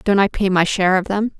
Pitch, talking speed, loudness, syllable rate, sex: 195 Hz, 300 wpm, -17 LUFS, 6.3 syllables/s, female